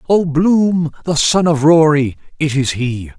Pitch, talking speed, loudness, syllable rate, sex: 150 Hz, 150 wpm, -14 LUFS, 3.9 syllables/s, male